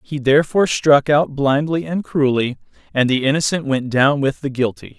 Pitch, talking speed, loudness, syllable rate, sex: 140 Hz, 180 wpm, -17 LUFS, 5.1 syllables/s, male